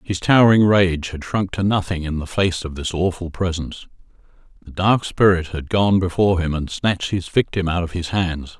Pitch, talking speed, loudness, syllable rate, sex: 90 Hz, 200 wpm, -19 LUFS, 5.2 syllables/s, male